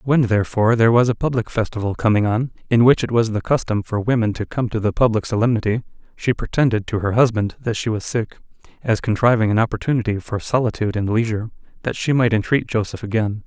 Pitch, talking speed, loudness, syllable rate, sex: 115 Hz, 205 wpm, -19 LUFS, 6.5 syllables/s, male